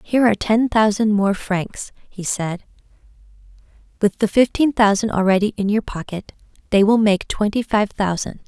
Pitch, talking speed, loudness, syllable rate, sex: 210 Hz, 155 wpm, -18 LUFS, 4.9 syllables/s, female